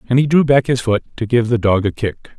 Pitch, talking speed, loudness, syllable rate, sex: 120 Hz, 300 wpm, -16 LUFS, 6.0 syllables/s, male